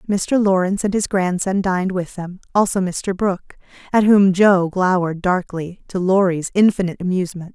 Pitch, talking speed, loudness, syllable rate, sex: 185 Hz, 160 wpm, -18 LUFS, 5.3 syllables/s, female